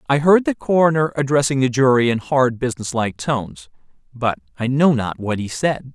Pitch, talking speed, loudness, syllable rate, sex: 130 Hz, 190 wpm, -18 LUFS, 5.3 syllables/s, male